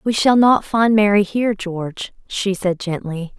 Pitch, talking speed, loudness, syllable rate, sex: 200 Hz, 175 wpm, -18 LUFS, 4.4 syllables/s, female